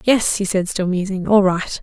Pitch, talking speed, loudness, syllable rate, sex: 195 Hz, 230 wpm, -18 LUFS, 4.6 syllables/s, female